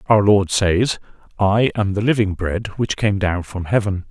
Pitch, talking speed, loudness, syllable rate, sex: 100 Hz, 190 wpm, -18 LUFS, 4.2 syllables/s, male